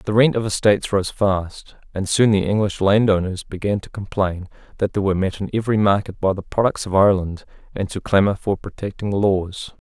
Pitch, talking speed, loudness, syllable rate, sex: 100 Hz, 195 wpm, -20 LUFS, 5.5 syllables/s, male